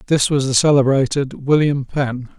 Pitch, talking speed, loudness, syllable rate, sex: 135 Hz, 150 wpm, -17 LUFS, 4.7 syllables/s, male